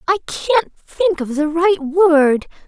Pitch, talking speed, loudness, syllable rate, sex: 325 Hz, 155 wpm, -16 LUFS, 3.2 syllables/s, female